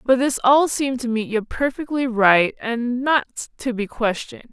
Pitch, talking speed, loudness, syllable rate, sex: 245 Hz, 175 wpm, -20 LUFS, 4.7 syllables/s, female